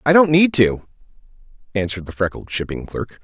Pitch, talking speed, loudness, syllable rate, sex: 125 Hz, 165 wpm, -19 LUFS, 5.7 syllables/s, male